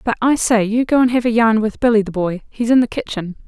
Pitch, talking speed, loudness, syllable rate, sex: 225 Hz, 275 wpm, -16 LUFS, 5.9 syllables/s, female